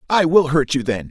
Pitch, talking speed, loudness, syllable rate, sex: 145 Hz, 270 wpm, -17 LUFS, 5.4 syllables/s, male